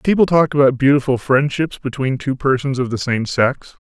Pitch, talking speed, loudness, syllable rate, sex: 135 Hz, 185 wpm, -17 LUFS, 5.1 syllables/s, male